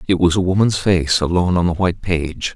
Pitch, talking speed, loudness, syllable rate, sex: 90 Hz, 235 wpm, -17 LUFS, 5.9 syllables/s, male